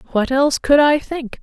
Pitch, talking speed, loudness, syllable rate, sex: 275 Hz, 210 wpm, -16 LUFS, 5.2 syllables/s, female